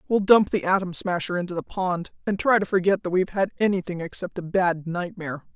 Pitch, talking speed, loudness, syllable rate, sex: 185 Hz, 215 wpm, -24 LUFS, 5.9 syllables/s, female